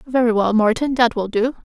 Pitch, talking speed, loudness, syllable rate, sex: 235 Hz, 210 wpm, -18 LUFS, 5.6 syllables/s, female